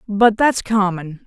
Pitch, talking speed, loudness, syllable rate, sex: 205 Hz, 140 wpm, -17 LUFS, 3.7 syllables/s, female